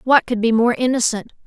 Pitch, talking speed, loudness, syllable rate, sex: 235 Hz, 205 wpm, -17 LUFS, 5.5 syllables/s, female